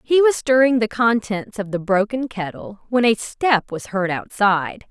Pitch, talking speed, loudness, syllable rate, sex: 220 Hz, 185 wpm, -19 LUFS, 4.5 syllables/s, female